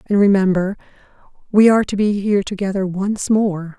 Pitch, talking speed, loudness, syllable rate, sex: 200 Hz, 160 wpm, -17 LUFS, 5.5 syllables/s, female